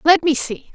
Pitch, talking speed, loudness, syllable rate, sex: 305 Hz, 240 wpm, -18 LUFS, 4.7 syllables/s, female